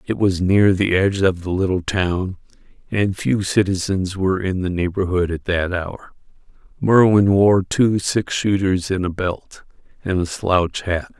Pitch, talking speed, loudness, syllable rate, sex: 95 Hz, 165 wpm, -19 LUFS, 4.2 syllables/s, male